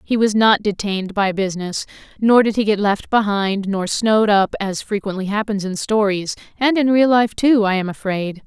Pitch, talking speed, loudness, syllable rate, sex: 205 Hz, 200 wpm, -18 LUFS, 5.1 syllables/s, female